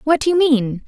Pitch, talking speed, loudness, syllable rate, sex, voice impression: 280 Hz, 275 wpm, -16 LUFS, 5.3 syllables/s, female, feminine, adult-like, tensed, bright, soft, raspy, intellectual, friendly, elegant, kind, modest